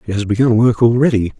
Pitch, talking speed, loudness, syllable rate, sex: 110 Hz, 215 wpm, -14 LUFS, 6.6 syllables/s, male